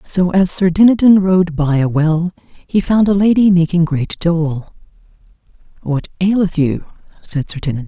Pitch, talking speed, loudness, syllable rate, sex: 175 Hz, 160 wpm, -14 LUFS, 4.6 syllables/s, female